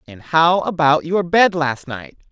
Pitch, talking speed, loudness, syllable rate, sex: 160 Hz, 180 wpm, -17 LUFS, 3.9 syllables/s, female